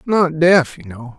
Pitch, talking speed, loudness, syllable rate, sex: 155 Hz, 205 wpm, -14 LUFS, 3.9 syllables/s, male